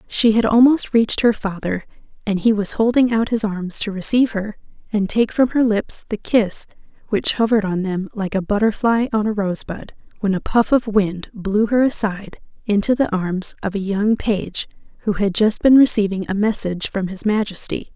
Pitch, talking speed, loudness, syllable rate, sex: 210 Hz, 195 wpm, -18 LUFS, 5.1 syllables/s, female